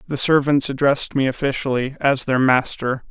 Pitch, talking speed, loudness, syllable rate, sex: 135 Hz, 155 wpm, -19 LUFS, 5.4 syllables/s, male